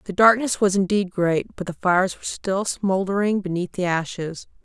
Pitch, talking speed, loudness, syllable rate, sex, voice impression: 190 Hz, 180 wpm, -22 LUFS, 5.1 syllables/s, female, feminine, adult-like, tensed, powerful, slightly muffled, slightly raspy, intellectual, slightly calm, lively, strict, slightly intense, sharp